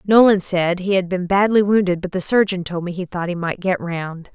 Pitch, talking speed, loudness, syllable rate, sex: 185 Hz, 250 wpm, -19 LUFS, 5.2 syllables/s, female